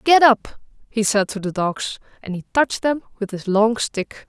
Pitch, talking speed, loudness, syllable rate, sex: 220 Hz, 210 wpm, -20 LUFS, 4.5 syllables/s, female